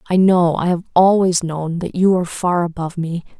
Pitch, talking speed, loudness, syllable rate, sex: 175 Hz, 175 wpm, -17 LUFS, 5.4 syllables/s, female